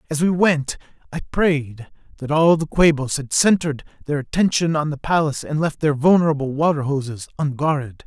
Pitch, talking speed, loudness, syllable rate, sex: 150 Hz, 170 wpm, -19 LUFS, 5.5 syllables/s, male